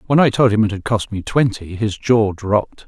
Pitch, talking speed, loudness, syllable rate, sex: 110 Hz, 250 wpm, -17 LUFS, 5.2 syllables/s, male